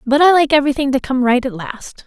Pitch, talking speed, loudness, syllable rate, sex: 270 Hz, 260 wpm, -14 LUFS, 6.2 syllables/s, female